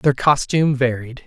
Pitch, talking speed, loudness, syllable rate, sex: 135 Hz, 140 wpm, -18 LUFS, 4.9 syllables/s, male